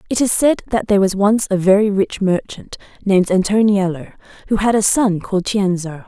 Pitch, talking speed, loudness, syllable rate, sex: 200 Hz, 190 wpm, -16 LUFS, 5.4 syllables/s, female